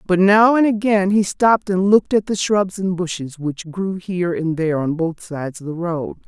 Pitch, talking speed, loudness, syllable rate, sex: 185 Hz, 230 wpm, -18 LUFS, 5.1 syllables/s, female